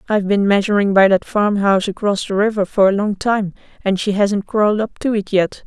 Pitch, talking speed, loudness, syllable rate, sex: 200 Hz, 220 wpm, -16 LUFS, 5.6 syllables/s, female